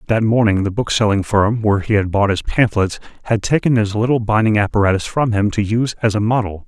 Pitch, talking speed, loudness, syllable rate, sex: 105 Hz, 215 wpm, -17 LUFS, 6.0 syllables/s, male